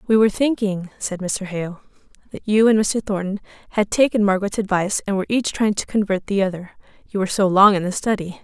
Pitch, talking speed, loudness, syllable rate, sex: 200 Hz, 215 wpm, -20 LUFS, 6.2 syllables/s, female